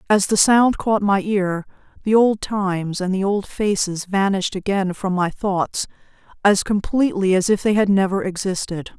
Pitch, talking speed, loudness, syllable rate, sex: 195 Hz, 175 wpm, -19 LUFS, 4.8 syllables/s, female